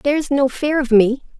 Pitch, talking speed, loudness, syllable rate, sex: 270 Hz, 215 wpm, -17 LUFS, 5.3 syllables/s, female